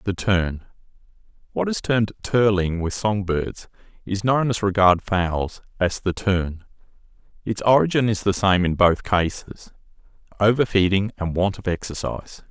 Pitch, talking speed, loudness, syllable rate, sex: 100 Hz, 140 wpm, -21 LUFS, 4.4 syllables/s, male